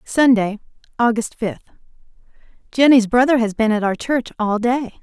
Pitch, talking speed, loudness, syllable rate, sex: 235 Hz, 130 wpm, -17 LUFS, 4.9 syllables/s, female